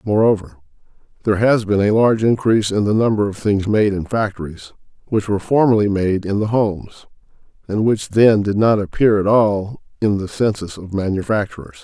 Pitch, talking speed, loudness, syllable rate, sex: 105 Hz, 180 wpm, -17 LUFS, 5.6 syllables/s, male